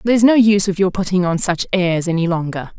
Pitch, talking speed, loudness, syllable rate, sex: 185 Hz, 235 wpm, -16 LUFS, 6.2 syllables/s, female